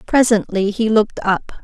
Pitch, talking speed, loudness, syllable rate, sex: 215 Hz, 145 wpm, -17 LUFS, 5.0 syllables/s, female